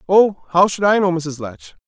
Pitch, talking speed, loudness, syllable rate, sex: 180 Hz, 225 wpm, -16 LUFS, 4.5 syllables/s, male